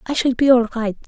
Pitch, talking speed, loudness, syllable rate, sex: 245 Hz, 280 wpm, -17 LUFS, 6.3 syllables/s, female